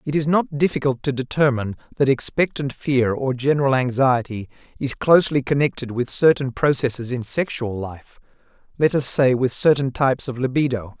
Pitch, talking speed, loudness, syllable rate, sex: 130 Hz, 160 wpm, -20 LUFS, 5.3 syllables/s, male